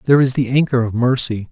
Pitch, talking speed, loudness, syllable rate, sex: 125 Hz, 235 wpm, -16 LUFS, 6.7 syllables/s, male